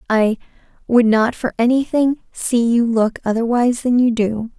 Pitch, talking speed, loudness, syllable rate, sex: 235 Hz, 155 wpm, -17 LUFS, 4.7 syllables/s, female